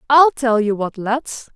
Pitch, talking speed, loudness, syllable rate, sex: 245 Hz, 195 wpm, -17 LUFS, 3.7 syllables/s, female